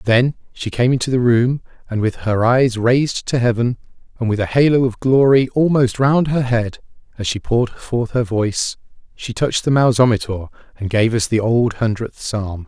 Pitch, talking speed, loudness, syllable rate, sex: 120 Hz, 190 wpm, -17 LUFS, 5.0 syllables/s, male